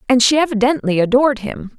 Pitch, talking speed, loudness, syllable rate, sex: 245 Hz, 170 wpm, -15 LUFS, 6.2 syllables/s, female